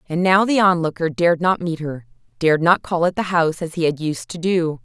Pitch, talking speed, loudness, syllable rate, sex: 170 Hz, 235 wpm, -19 LUFS, 5.7 syllables/s, female